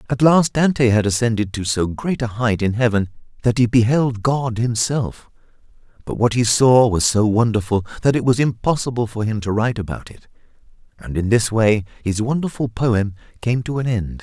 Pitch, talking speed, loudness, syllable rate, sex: 115 Hz, 185 wpm, -18 LUFS, 5.2 syllables/s, male